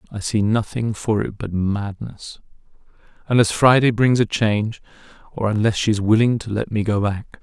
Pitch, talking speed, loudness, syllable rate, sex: 110 Hz, 180 wpm, -19 LUFS, 5.0 syllables/s, male